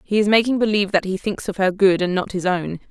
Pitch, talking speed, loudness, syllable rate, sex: 195 Hz, 290 wpm, -19 LUFS, 6.3 syllables/s, female